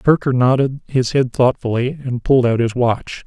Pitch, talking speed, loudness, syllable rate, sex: 125 Hz, 185 wpm, -17 LUFS, 4.9 syllables/s, male